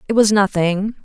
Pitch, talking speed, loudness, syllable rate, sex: 200 Hz, 175 wpm, -16 LUFS, 4.9 syllables/s, female